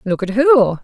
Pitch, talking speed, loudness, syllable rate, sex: 230 Hz, 215 wpm, -14 LUFS, 4.2 syllables/s, female